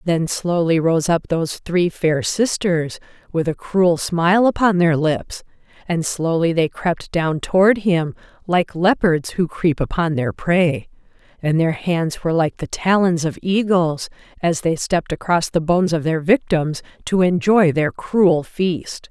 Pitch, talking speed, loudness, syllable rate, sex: 170 Hz, 165 wpm, -18 LUFS, 4.1 syllables/s, female